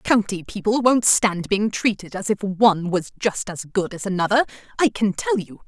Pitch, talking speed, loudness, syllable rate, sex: 200 Hz, 200 wpm, -21 LUFS, 4.9 syllables/s, female